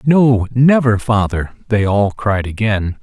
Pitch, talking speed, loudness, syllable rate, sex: 110 Hz, 140 wpm, -15 LUFS, 3.8 syllables/s, male